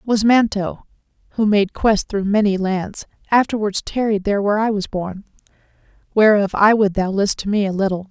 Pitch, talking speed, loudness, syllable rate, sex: 205 Hz, 180 wpm, -18 LUFS, 5.2 syllables/s, female